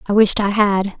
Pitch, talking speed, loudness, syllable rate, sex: 200 Hz, 240 wpm, -16 LUFS, 4.8 syllables/s, female